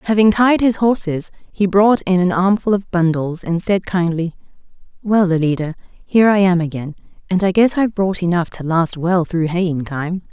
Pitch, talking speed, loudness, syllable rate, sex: 185 Hz, 185 wpm, -16 LUFS, 4.9 syllables/s, female